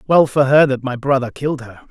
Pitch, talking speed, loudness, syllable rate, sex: 135 Hz, 250 wpm, -16 LUFS, 5.9 syllables/s, male